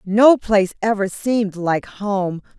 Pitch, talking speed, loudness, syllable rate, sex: 205 Hz, 140 wpm, -18 LUFS, 4.0 syllables/s, female